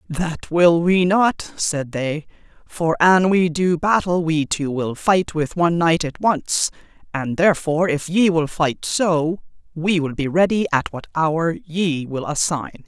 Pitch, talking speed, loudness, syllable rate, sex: 165 Hz, 170 wpm, -19 LUFS, 3.9 syllables/s, female